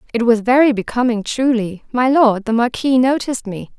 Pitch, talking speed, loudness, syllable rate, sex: 240 Hz, 160 wpm, -16 LUFS, 5.3 syllables/s, female